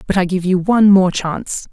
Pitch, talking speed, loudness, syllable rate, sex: 190 Hz, 245 wpm, -14 LUFS, 5.7 syllables/s, female